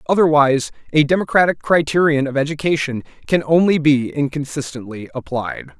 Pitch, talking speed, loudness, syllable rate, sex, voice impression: 150 Hz, 115 wpm, -17 LUFS, 5.6 syllables/s, male, very masculine, very middle-aged, thick, very tensed, very powerful, bright, hard, very clear, fluent, slightly raspy, cool, slightly intellectual, refreshing, sincere, slightly calm, slightly mature, slightly friendly, slightly reassuring, very unique, slightly elegant, wild, slightly sweet, very lively, slightly strict, intense, sharp